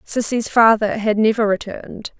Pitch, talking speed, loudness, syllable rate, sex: 220 Hz, 135 wpm, -17 LUFS, 4.9 syllables/s, female